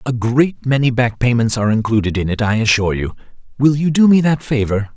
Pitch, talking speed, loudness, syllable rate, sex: 120 Hz, 220 wpm, -16 LUFS, 5.9 syllables/s, male